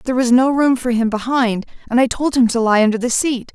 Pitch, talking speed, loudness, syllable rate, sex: 245 Hz, 270 wpm, -16 LUFS, 6.0 syllables/s, female